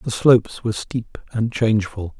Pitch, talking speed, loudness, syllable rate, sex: 110 Hz, 165 wpm, -20 LUFS, 5.0 syllables/s, male